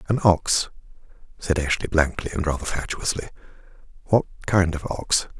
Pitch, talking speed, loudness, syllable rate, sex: 85 Hz, 135 wpm, -23 LUFS, 5.1 syllables/s, male